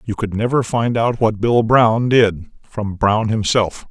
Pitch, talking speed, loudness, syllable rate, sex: 110 Hz, 185 wpm, -17 LUFS, 3.8 syllables/s, male